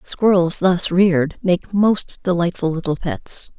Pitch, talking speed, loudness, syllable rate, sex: 180 Hz, 135 wpm, -18 LUFS, 3.8 syllables/s, female